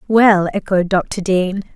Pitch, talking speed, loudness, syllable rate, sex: 190 Hz, 135 wpm, -16 LUFS, 3.5 syllables/s, female